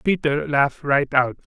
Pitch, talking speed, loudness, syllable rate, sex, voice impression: 145 Hz, 155 wpm, -20 LUFS, 4.7 syllables/s, male, masculine, adult-like, slightly muffled, slightly halting, refreshing, slightly sincere, calm, slightly kind